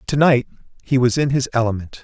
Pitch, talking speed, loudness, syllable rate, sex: 125 Hz, 205 wpm, -18 LUFS, 5.9 syllables/s, male